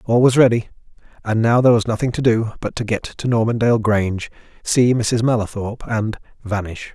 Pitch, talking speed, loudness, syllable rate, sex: 115 Hz, 165 wpm, -18 LUFS, 5.7 syllables/s, male